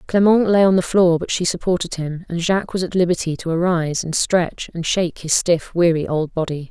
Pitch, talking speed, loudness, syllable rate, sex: 170 Hz, 225 wpm, -19 LUFS, 5.5 syllables/s, female